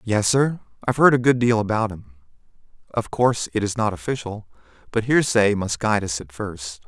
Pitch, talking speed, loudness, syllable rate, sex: 110 Hz, 185 wpm, -21 LUFS, 5.6 syllables/s, male